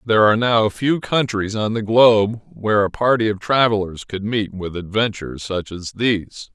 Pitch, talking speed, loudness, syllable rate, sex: 105 Hz, 185 wpm, -19 LUFS, 5.1 syllables/s, male